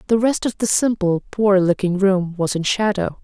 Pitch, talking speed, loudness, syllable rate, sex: 195 Hz, 205 wpm, -18 LUFS, 4.7 syllables/s, female